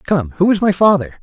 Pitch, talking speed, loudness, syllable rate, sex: 185 Hz, 245 wpm, -14 LUFS, 5.8 syllables/s, male